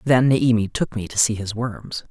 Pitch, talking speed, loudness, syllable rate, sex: 115 Hz, 230 wpm, -20 LUFS, 4.6 syllables/s, male